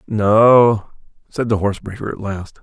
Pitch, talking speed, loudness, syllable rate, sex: 105 Hz, 160 wpm, -16 LUFS, 4.3 syllables/s, male